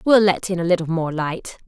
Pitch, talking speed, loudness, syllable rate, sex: 175 Hz, 250 wpm, -20 LUFS, 5.4 syllables/s, female